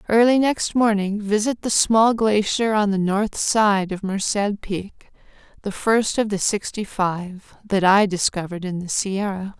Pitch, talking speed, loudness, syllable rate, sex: 205 Hz, 165 wpm, -20 LUFS, 4.2 syllables/s, female